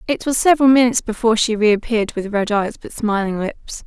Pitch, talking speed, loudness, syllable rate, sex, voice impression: 225 Hz, 200 wpm, -17 LUFS, 5.9 syllables/s, female, very feminine, slightly young, very adult-like, very thin, tensed, slightly weak, bright, slightly hard, clear, slightly halting, cool, very intellectual, very refreshing, very sincere, slightly calm, friendly, slightly reassuring, slightly unique, elegant, wild, slightly sweet, slightly strict, slightly sharp, slightly modest